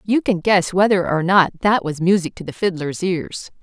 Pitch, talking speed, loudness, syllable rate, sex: 180 Hz, 215 wpm, -18 LUFS, 4.9 syllables/s, female